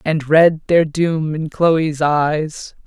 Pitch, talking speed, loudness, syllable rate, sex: 155 Hz, 145 wpm, -16 LUFS, 2.7 syllables/s, female